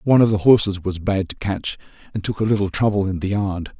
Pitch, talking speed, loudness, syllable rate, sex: 100 Hz, 255 wpm, -20 LUFS, 6.1 syllables/s, male